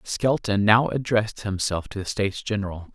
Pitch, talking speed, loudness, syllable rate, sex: 105 Hz, 165 wpm, -24 LUFS, 5.3 syllables/s, male